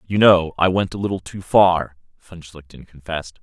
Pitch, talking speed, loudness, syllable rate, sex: 90 Hz, 195 wpm, -18 LUFS, 5.0 syllables/s, male